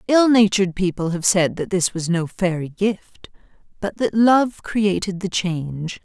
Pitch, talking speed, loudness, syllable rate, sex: 190 Hz, 170 wpm, -20 LUFS, 4.3 syllables/s, female